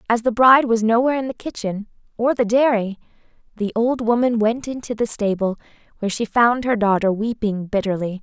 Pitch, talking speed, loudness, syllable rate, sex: 225 Hz, 180 wpm, -19 LUFS, 5.7 syllables/s, female